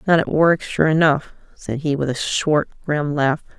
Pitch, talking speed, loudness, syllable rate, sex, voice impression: 150 Hz, 200 wpm, -19 LUFS, 4.4 syllables/s, female, very feminine, very adult-like, thin, tensed, powerful, bright, slightly soft, clear, fluent, slightly raspy, cool, very intellectual, refreshing, very sincere, very calm, very friendly, very reassuring, unique, very elegant, wild, very sweet, lively, kind, slightly intense, slightly light